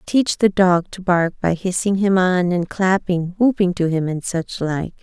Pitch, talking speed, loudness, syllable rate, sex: 185 Hz, 205 wpm, -19 LUFS, 4.2 syllables/s, female